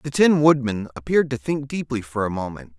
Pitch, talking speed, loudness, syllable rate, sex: 125 Hz, 215 wpm, -21 LUFS, 5.6 syllables/s, male